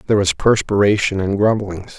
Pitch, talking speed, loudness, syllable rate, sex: 100 Hz, 150 wpm, -16 LUFS, 5.5 syllables/s, male